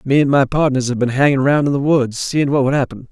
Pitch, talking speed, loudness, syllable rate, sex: 135 Hz, 290 wpm, -16 LUFS, 6.0 syllables/s, male